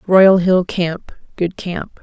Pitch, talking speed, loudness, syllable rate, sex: 180 Hz, 120 wpm, -16 LUFS, 3.0 syllables/s, female